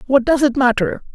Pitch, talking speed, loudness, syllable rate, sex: 255 Hz, 210 wpm, -16 LUFS, 5.6 syllables/s, female